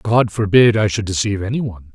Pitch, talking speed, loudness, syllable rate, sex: 105 Hz, 185 wpm, -16 LUFS, 6.0 syllables/s, male